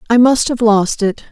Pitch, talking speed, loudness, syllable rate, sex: 225 Hz, 230 wpm, -13 LUFS, 4.7 syllables/s, female